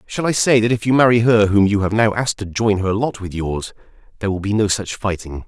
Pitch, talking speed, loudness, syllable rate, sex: 105 Hz, 275 wpm, -17 LUFS, 6.0 syllables/s, male